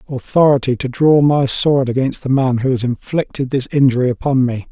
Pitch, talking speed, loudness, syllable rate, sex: 130 Hz, 190 wpm, -15 LUFS, 5.4 syllables/s, male